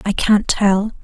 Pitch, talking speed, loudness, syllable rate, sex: 205 Hz, 175 wpm, -16 LUFS, 3.6 syllables/s, female